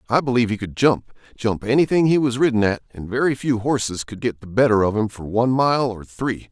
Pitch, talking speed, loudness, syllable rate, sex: 120 Hz, 230 wpm, -20 LUFS, 5.9 syllables/s, male